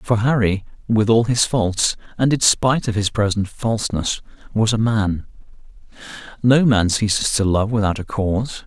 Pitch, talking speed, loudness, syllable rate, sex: 110 Hz, 165 wpm, -19 LUFS, 4.8 syllables/s, male